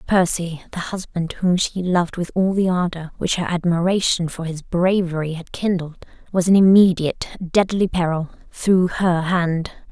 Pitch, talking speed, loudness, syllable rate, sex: 175 Hz, 155 wpm, -20 LUFS, 4.6 syllables/s, female